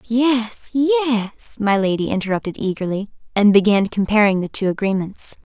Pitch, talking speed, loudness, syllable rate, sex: 215 Hz, 130 wpm, -19 LUFS, 4.6 syllables/s, female